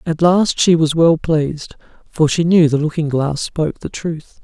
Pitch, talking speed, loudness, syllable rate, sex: 160 Hz, 205 wpm, -16 LUFS, 4.5 syllables/s, male